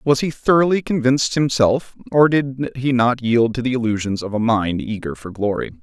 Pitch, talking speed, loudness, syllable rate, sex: 125 Hz, 195 wpm, -19 LUFS, 5.1 syllables/s, male